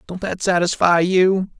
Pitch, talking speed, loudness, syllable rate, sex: 180 Hz, 150 wpm, -17 LUFS, 4.3 syllables/s, male